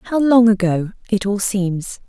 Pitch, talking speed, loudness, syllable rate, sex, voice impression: 205 Hz, 175 wpm, -17 LUFS, 3.9 syllables/s, female, feminine, middle-aged, tensed, powerful, bright, slightly soft, clear, slightly halting, intellectual, slightly friendly, elegant, lively, slightly strict, intense, sharp